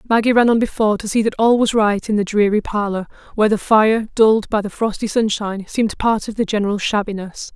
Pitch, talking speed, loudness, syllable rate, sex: 215 Hz, 220 wpm, -17 LUFS, 6.2 syllables/s, female